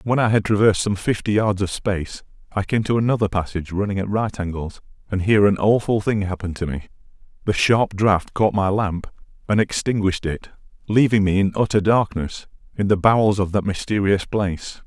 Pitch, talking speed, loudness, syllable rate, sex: 100 Hz, 190 wpm, -20 LUFS, 5.7 syllables/s, male